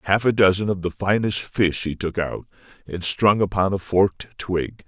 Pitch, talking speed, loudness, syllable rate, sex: 95 Hz, 195 wpm, -21 LUFS, 4.7 syllables/s, male